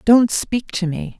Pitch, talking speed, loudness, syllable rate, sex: 210 Hz, 200 wpm, -19 LUFS, 3.7 syllables/s, female